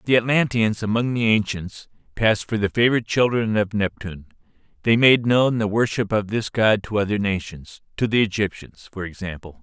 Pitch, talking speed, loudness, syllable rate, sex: 105 Hz, 170 wpm, -21 LUFS, 5.4 syllables/s, male